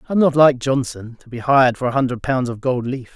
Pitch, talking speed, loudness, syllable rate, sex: 130 Hz, 285 wpm, -18 LUFS, 6.1 syllables/s, male